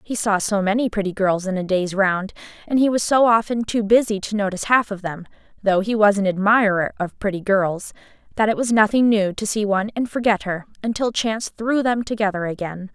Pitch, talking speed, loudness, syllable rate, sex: 210 Hz, 210 wpm, -20 LUFS, 5.6 syllables/s, female